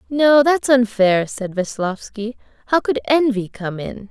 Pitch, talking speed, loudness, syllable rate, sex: 235 Hz, 145 wpm, -18 LUFS, 4.0 syllables/s, female